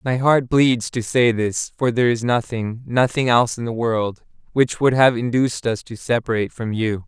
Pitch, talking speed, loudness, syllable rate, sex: 120 Hz, 185 wpm, -19 LUFS, 5.0 syllables/s, male